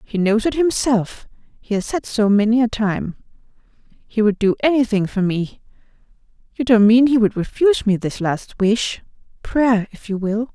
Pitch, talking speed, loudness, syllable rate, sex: 220 Hz, 170 wpm, -18 LUFS, 4.7 syllables/s, female